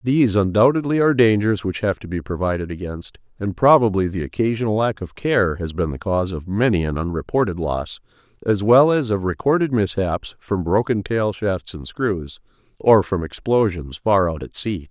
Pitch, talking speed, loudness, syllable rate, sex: 100 Hz, 180 wpm, -20 LUFS, 5.1 syllables/s, male